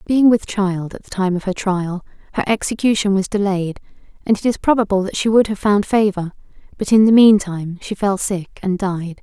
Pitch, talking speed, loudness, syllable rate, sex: 200 Hz, 215 wpm, -17 LUFS, 5.1 syllables/s, female